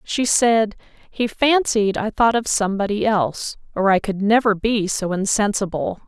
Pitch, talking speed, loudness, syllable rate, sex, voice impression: 210 Hz, 160 wpm, -19 LUFS, 4.6 syllables/s, female, feminine, adult-like, tensed, powerful, slightly bright, clear, slightly halting, friendly, slightly reassuring, elegant, lively, kind